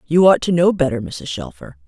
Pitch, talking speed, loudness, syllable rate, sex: 130 Hz, 225 wpm, -17 LUFS, 5.3 syllables/s, female